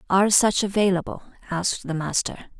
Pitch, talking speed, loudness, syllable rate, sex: 190 Hz, 140 wpm, -22 LUFS, 5.7 syllables/s, female